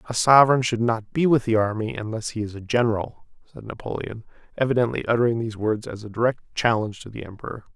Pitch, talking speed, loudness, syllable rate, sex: 115 Hz, 200 wpm, -22 LUFS, 6.7 syllables/s, male